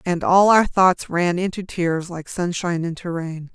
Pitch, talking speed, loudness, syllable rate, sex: 175 Hz, 185 wpm, -20 LUFS, 4.4 syllables/s, female